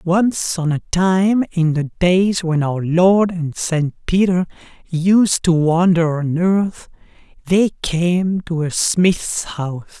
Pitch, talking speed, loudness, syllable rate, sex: 175 Hz, 145 wpm, -17 LUFS, 3.1 syllables/s, male